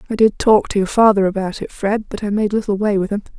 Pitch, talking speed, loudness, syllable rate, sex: 210 Hz, 285 wpm, -17 LUFS, 6.3 syllables/s, female